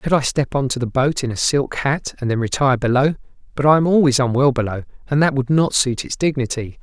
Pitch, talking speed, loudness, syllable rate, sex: 135 Hz, 235 wpm, -18 LUFS, 5.9 syllables/s, male